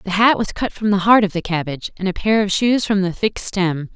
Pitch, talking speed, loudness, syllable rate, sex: 195 Hz, 290 wpm, -18 LUFS, 5.5 syllables/s, female